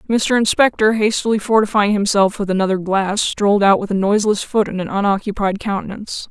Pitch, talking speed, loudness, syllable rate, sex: 205 Hz, 170 wpm, -17 LUFS, 5.9 syllables/s, female